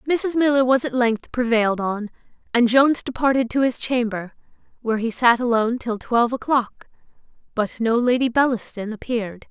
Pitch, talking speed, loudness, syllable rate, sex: 240 Hz, 160 wpm, -20 LUFS, 5.5 syllables/s, female